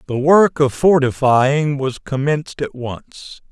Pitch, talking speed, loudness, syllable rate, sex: 140 Hz, 135 wpm, -16 LUFS, 3.7 syllables/s, male